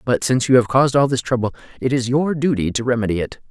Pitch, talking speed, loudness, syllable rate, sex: 125 Hz, 255 wpm, -18 LUFS, 6.8 syllables/s, male